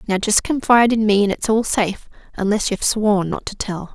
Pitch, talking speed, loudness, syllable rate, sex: 210 Hz, 230 wpm, -18 LUFS, 5.6 syllables/s, female